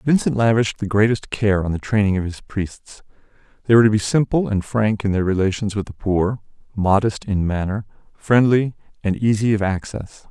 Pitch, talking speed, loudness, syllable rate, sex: 105 Hz, 185 wpm, -19 LUFS, 5.3 syllables/s, male